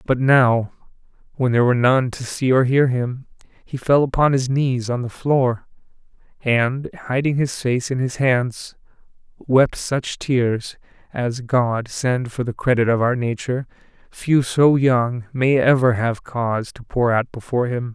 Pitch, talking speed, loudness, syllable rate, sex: 125 Hz, 165 wpm, -19 LUFS, 4.2 syllables/s, male